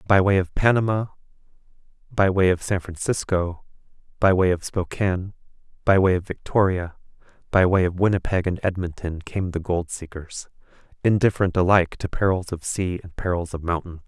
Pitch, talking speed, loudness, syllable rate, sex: 90 Hz, 160 wpm, -22 LUFS, 5.5 syllables/s, male